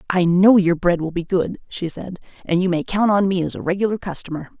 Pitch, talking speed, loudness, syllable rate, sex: 180 Hz, 250 wpm, -19 LUFS, 5.7 syllables/s, female